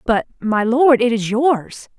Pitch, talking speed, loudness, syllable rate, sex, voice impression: 240 Hz, 180 wpm, -16 LUFS, 3.7 syllables/s, female, feminine, slightly young, slightly cute, slightly refreshing, friendly